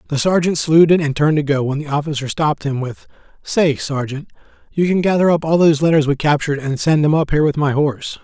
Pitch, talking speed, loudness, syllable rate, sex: 150 Hz, 235 wpm, -16 LUFS, 6.5 syllables/s, male